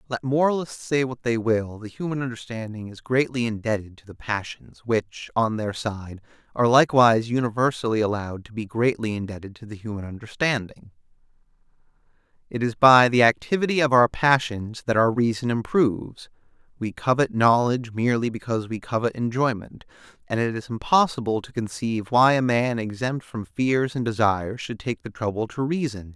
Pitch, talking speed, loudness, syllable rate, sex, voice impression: 120 Hz, 165 wpm, -23 LUFS, 5.4 syllables/s, male, masculine, adult-like, slightly clear, slightly fluent, sincere, calm